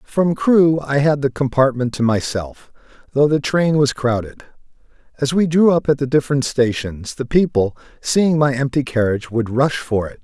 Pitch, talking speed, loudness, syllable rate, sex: 135 Hz, 180 wpm, -17 LUFS, 5.0 syllables/s, male